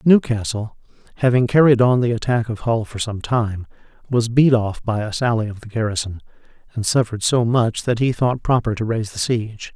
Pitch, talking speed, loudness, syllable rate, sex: 115 Hz, 195 wpm, -19 LUFS, 5.5 syllables/s, male